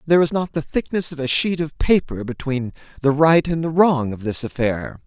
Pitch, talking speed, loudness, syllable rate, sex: 145 Hz, 225 wpm, -20 LUFS, 5.2 syllables/s, male